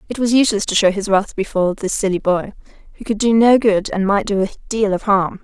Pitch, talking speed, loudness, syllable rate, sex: 205 Hz, 255 wpm, -17 LUFS, 6.1 syllables/s, female